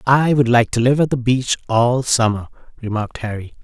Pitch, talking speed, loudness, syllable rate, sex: 120 Hz, 200 wpm, -17 LUFS, 5.3 syllables/s, male